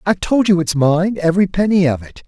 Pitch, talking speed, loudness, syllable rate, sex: 175 Hz, 235 wpm, -15 LUFS, 6.1 syllables/s, male